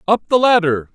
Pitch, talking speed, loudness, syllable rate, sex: 205 Hz, 190 wpm, -15 LUFS, 5.7 syllables/s, male